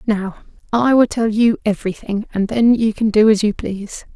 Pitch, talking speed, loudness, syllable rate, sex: 215 Hz, 200 wpm, -17 LUFS, 5.2 syllables/s, female